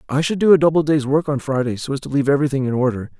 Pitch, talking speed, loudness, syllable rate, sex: 140 Hz, 300 wpm, -18 LUFS, 7.8 syllables/s, male